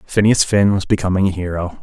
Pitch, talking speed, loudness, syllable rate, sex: 95 Hz, 195 wpm, -16 LUFS, 5.9 syllables/s, male